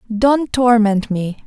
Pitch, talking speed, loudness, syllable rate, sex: 225 Hz, 125 wpm, -15 LUFS, 3.3 syllables/s, female